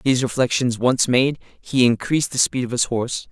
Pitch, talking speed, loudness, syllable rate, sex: 125 Hz, 200 wpm, -19 LUFS, 5.5 syllables/s, male